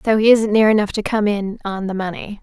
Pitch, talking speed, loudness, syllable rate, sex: 210 Hz, 250 wpm, -17 LUFS, 5.7 syllables/s, female